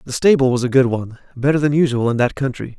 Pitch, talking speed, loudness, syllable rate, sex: 130 Hz, 260 wpm, -17 LUFS, 6.9 syllables/s, male